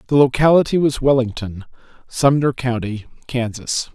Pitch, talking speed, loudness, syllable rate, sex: 125 Hz, 105 wpm, -18 LUFS, 4.8 syllables/s, male